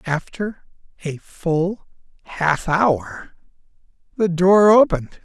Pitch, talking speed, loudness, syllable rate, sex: 175 Hz, 90 wpm, -18 LUFS, 3.1 syllables/s, male